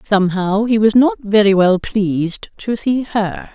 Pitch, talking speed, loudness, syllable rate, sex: 210 Hz, 170 wpm, -15 LUFS, 4.2 syllables/s, female